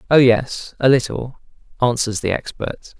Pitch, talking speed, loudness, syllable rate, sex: 125 Hz, 140 wpm, -19 LUFS, 4.3 syllables/s, male